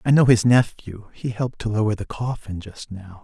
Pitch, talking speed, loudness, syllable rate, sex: 110 Hz, 220 wpm, -21 LUFS, 5.2 syllables/s, male